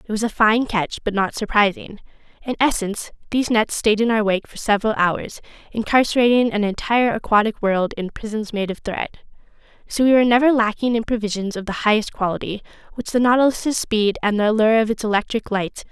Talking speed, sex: 205 wpm, female